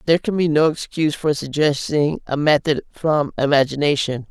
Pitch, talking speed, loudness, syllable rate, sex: 150 Hz, 155 wpm, -19 LUFS, 5.3 syllables/s, female